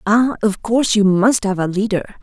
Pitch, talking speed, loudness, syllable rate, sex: 205 Hz, 215 wpm, -16 LUFS, 5.2 syllables/s, female